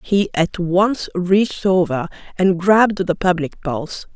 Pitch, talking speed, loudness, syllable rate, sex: 185 Hz, 145 wpm, -18 LUFS, 4.1 syllables/s, female